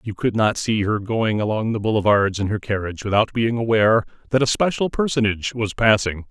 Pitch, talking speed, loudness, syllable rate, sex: 110 Hz, 200 wpm, -20 LUFS, 5.8 syllables/s, male